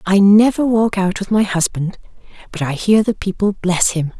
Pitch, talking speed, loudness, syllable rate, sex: 195 Hz, 200 wpm, -16 LUFS, 4.8 syllables/s, female